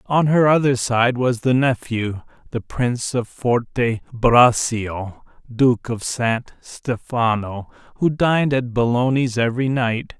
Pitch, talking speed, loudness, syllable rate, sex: 125 Hz, 130 wpm, -19 LUFS, 4.4 syllables/s, male